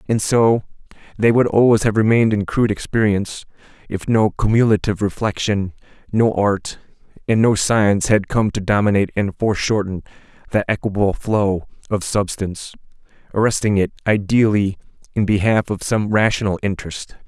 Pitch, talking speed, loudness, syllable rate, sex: 105 Hz, 135 wpm, -18 LUFS, 5.4 syllables/s, male